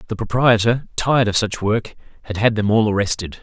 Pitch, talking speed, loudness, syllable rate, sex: 110 Hz, 195 wpm, -18 LUFS, 5.7 syllables/s, male